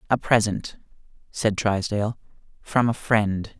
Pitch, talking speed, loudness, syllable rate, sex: 105 Hz, 115 wpm, -23 LUFS, 4.1 syllables/s, male